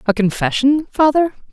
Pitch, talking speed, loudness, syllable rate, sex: 250 Hz, 120 wpm, -16 LUFS, 4.8 syllables/s, female